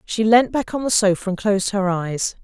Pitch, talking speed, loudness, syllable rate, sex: 205 Hz, 245 wpm, -19 LUFS, 5.3 syllables/s, female